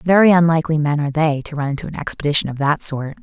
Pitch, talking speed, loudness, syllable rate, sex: 155 Hz, 240 wpm, -17 LUFS, 7.1 syllables/s, female